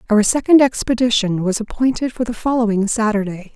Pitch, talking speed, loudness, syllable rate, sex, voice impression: 225 Hz, 150 wpm, -17 LUFS, 5.6 syllables/s, female, feminine, adult-like, slightly weak, slightly raspy, calm, reassuring